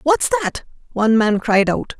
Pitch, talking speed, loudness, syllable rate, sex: 250 Hz, 180 wpm, -17 LUFS, 4.8 syllables/s, female